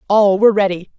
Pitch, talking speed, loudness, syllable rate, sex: 200 Hz, 185 wpm, -14 LUFS, 6.7 syllables/s, female